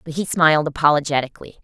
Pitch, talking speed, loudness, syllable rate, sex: 150 Hz, 145 wpm, -18 LUFS, 7.3 syllables/s, female